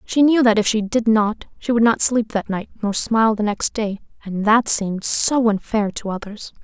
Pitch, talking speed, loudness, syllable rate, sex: 220 Hz, 215 wpm, -18 LUFS, 4.8 syllables/s, female